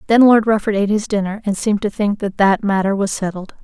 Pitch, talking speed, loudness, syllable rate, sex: 205 Hz, 250 wpm, -17 LUFS, 6.2 syllables/s, female